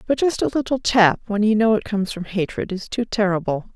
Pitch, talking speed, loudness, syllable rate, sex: 210 Hz, 240 wpm, -20 LUFS, 5.7 syllables/s, female